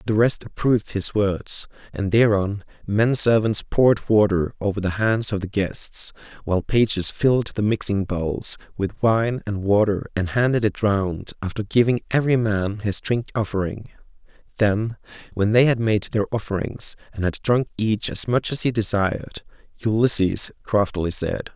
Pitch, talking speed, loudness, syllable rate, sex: 105 Hz, 160 wpm, -21 LUFS, 4.7 syllables/s, male